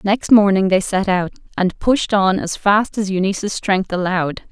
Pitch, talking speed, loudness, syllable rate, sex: 195 Hz, 185 wpm, -17 LUFS, 4.6 syllables/s, female